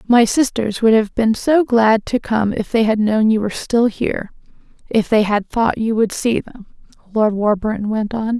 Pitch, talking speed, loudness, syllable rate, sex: 220 Hz, 200 wpm, -17 LUFS, 4.7 syllables/s, female